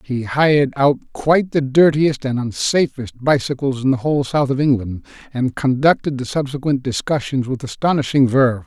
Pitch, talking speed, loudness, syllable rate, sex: 135 Hz, 160 wpm, -18 LUFS, 5.1 syllables/s, male